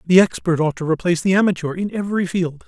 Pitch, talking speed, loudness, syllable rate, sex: 175 Hz, 225 wpm, -19 LUFS, 6.6 syllables/s, male